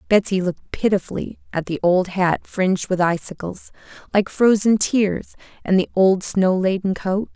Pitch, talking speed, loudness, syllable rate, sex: 190 Hz, 155 wpm, -20 LUFS, 4.7 syllables/s, female